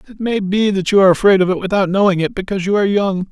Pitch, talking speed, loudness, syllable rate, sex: 195 Hz, 290 wpm, -15 LUFS, 7.4 syllables/s, male